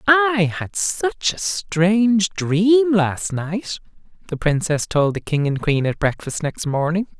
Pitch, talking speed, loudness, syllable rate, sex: 185 Hz, 160 wpm, -19 LUFS, 3.6 syllables/s, male